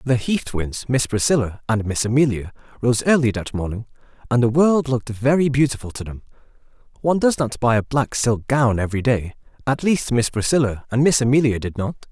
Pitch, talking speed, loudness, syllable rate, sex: 125 Hz, 190 wpm, -20 LUFS, 5.6 syllables/s, male